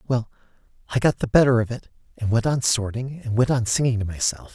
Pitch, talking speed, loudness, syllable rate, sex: 120 Hz, 225 wpm, -22 LUFS, 6.1 syllables/s, male